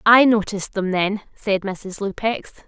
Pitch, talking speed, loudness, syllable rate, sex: 205 Hz, 155 wpm, -21 LUFS, 4.4 syllables/s, female